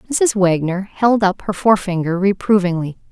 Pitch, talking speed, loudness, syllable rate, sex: 190 Hz, 135 wpm, -17 LUFS, 5.1 syllables/s, female